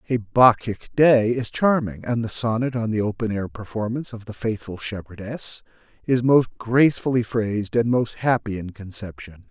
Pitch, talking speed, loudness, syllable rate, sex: 115 Hz, 165 wpm, -22 LUFS, 5.0 syllables/s, male